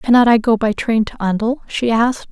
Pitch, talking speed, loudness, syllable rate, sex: 230 Hz, 235 wpm, -16 LUFS, 5.5 syllables/s, female